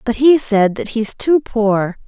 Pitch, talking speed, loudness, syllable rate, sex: 230 Hz, 230 wpm, -15 LUFS, 4.2 syllables/s, female